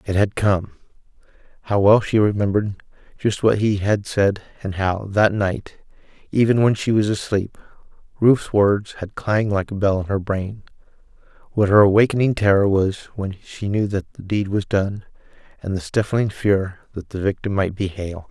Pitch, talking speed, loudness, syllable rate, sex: 100 Hz, 170 wpm, -20 LUFS, 4.9 syllables/s, male